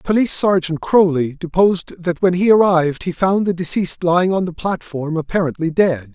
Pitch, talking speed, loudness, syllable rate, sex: 175 Hz, 175 wpm, -17 LUFS, 5.5 syllables/s, male